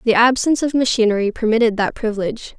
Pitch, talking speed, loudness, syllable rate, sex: 230 Hz, 165 wpm, -17 LUFS, 6.9 syllables/s, female